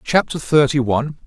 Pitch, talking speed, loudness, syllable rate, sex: 140 Hz, 140 wpm, -17 LUFS, 5.4 syllables/s, male